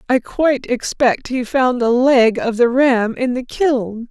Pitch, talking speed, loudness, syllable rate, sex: 250 Hz, 190 wpm, -16 LUFS, 3.9 syllables/s, female